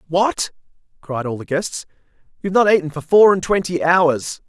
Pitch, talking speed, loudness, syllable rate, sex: 175 Hz, 190 wpm, -17 LUFS, 5.0 syllables/s, male